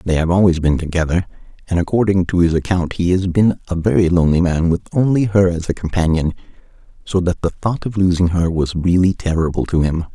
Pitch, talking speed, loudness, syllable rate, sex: 90 Hz, 205 wpm, -17 LUFS, 6.0 syllables/s, male